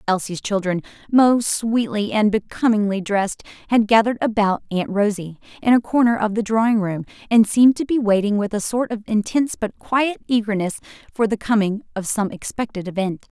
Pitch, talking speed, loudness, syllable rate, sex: 215 Hz, 175 wpm, -20 LUFS, 5.4 syllables/s, female